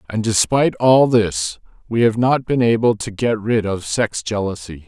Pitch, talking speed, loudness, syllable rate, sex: 110 Hz, 185 wpm, -17 LUFS, 4.5 syllables/s, male